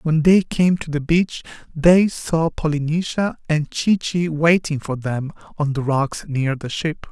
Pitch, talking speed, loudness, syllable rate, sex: 155 Hz, 175 wpm, -19 LUFS, 4.0 syllables/s, male